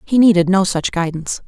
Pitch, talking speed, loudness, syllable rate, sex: 185 Hz, 205 wpm, -16 LUFS, 5.9 syllables/s, female